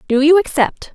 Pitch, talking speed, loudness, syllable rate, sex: 300 Hz, 190 wpm, -14 LUFS, 5.1 syllables/s, female